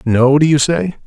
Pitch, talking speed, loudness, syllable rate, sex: 145 Hz, 225 wpm, -13 LUFS, 4.7 syllables/s, male